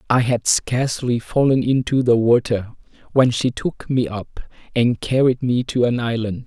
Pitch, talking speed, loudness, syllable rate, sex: 120 Hz, 165 wpm, -19 LUFS, 4.4 syllables/s, male